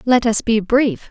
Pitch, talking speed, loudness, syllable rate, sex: 230 Hz, 220 wpm, -16 LUFS, 4.0 syllables/s, female